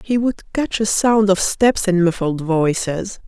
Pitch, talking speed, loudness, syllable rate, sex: 195 Hz, 185 wpm, -18 LUFS, 3.8 syllables/s, female